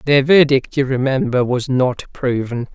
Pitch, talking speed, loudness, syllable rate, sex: 130 Hz, 155 wpm, -16 LUFS, 4.4 syllables/s, female